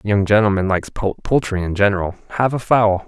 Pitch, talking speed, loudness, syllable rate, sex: 105 Hz, 175 wpm, -18 LUFS, 5.5 syllables/s, male